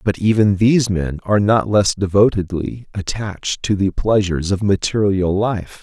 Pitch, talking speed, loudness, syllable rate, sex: 100 Hz, 155 wpm, -17 LUFS, 4.8 syllables/s, male